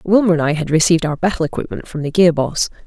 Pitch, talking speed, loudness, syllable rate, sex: 165 Hz, 250 wpm, -16 LUFS, 6.9 syllables/s, female